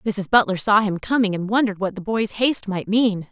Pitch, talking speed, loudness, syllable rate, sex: 205 Hz, 235 wpm, -20 LUFS, 5.7 syllables/s, female